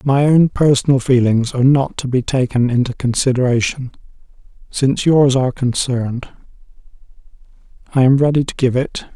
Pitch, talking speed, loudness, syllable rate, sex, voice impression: 130 Hz, 140 wpm, -15 LUFS, 5.4 syllables/s, male, masculine, old, slightly thick, sincere, calm, reassuring, slightly kind